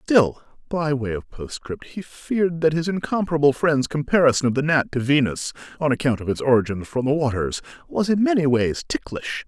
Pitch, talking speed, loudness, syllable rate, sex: 145 Hz, 190 wpm, -22 LUFS, 5.4 syllables/s, male